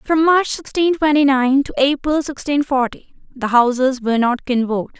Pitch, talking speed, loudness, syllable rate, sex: 270 Hz, 170 wpm, -17 LUFS, 5.0 syllables/s, female